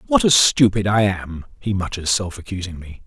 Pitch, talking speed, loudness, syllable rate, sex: 100 Hz, 175 wpm, -18 LUFS, 5.1 syllables/s, male